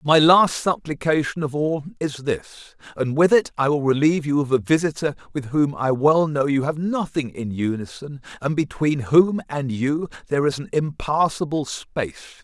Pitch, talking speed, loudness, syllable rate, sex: 145 Hz, 180 wpm, -21 LUFS, 5.0 syllables/s, male